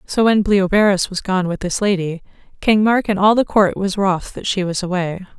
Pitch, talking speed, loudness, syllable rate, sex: 195 Hz, 225 wpm, -17 LUFS, 5.1 syllables/s, female